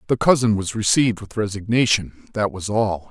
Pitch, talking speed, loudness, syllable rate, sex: 105 Hz, 175 wpm, -20 LUFS, 5.6 syllables/s, male